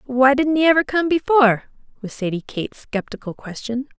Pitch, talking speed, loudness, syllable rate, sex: 260 Hz, 165 wpm, -19 LUFS, 5.6 syllables/s, female